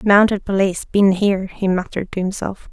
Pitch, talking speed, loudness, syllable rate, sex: 195 Hz, 175 wpm, -18 LUFS, 5.8 syllables/s, female